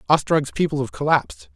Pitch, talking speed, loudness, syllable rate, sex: 145 Hz, 155 wpm, -21 LUFS, 5.9 syllables/s, male